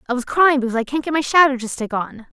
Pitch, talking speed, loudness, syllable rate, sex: 265 Hz, 300 wpm, -18 LUFS, 7.0 syllables/s, female